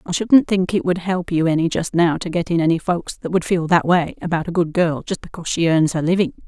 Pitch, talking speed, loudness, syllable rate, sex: 170 Hz, 280 wpm, -19 LUFS, 5.8 syllables/s, female